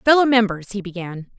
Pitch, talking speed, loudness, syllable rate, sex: 210 Hz, 175 wpm, -19 LUFS, 5.6 syllables/s, female